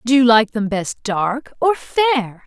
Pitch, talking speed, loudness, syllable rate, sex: 240 Hz, 195 wpm, -17 LUFS, 4.4 syllables/s, female